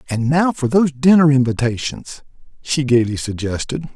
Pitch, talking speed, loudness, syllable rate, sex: 135 Hz, 135 wpm, -17 LUFS, 5.1 syllables/s, male